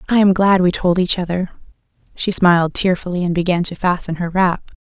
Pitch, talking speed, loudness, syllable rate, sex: 180 Hz, 200 wpm, -16 LUFS, 5.6 syllables/s, female